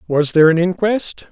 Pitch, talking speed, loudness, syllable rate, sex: 175 Hz, 185 wpm, -15 LUFS, 5.3 syllables/s, male